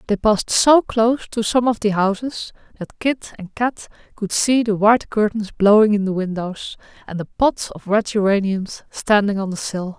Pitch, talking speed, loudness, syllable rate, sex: 210 Hz, 190 wpm, -18 LUFS, 4.7 syllables/s, female